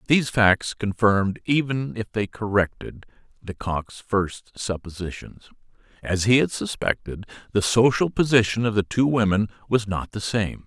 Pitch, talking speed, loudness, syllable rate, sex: 105 Hz, 140 wpm, -23 LUFS, 4.6 syllables/s, male